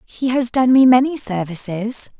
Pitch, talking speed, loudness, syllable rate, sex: 235 Hz, 165 wpm, -16 LUFS, 4.5 syllables/s, female